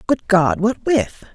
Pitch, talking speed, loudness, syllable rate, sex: 230 Hz, 180 wpm, -17 LUFS, 3.5 syllables/s, female